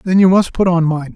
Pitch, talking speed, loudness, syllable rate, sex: 175 Hz, 310 wpm, -13 LUFS, 5.9 syllables/s, male